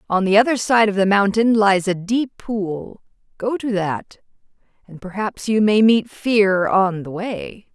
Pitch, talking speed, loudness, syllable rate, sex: 205 Hz, 180 wpm, -18 LUFS, 4.0 syllables/s, female